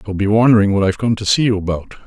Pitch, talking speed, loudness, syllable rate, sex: 105 Hz, 290 wpm, -15 LUFS, 7.7 syllables/s, male